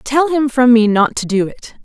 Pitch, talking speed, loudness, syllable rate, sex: 250 Hz, 260 wpm, -14 LUFS, 4.5 syllables/s, female